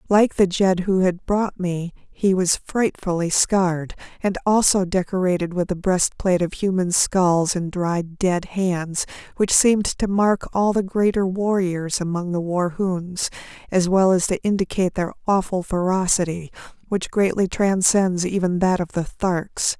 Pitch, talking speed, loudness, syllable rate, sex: 185 Hz, 155 wpm, -21 LUFS, 4.2 syllables/s, female